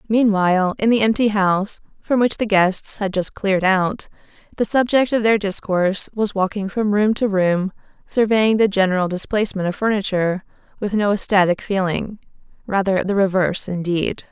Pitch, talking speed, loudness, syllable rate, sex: 200 Hz, 160 wpm, -19 LUFS, 5.2 syllables/s, female